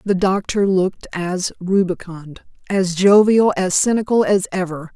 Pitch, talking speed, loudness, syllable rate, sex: 185 Hz, 135 wpm, -17 LUFS, 4.3 syllables/s, female